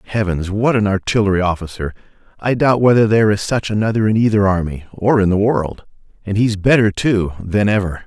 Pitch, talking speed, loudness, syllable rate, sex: 105 Hz, 195 wpm, -16 LUFS, 5.8 syllables/s, male